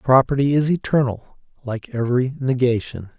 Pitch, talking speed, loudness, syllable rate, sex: 130 Hz, 115 wpm, -20 LUFS, 5.0 syllables/s, male